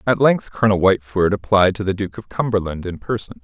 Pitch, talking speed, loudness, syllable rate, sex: 100 Hz, 210 wpm, -19 LUFS, 6.0 syllables/s, male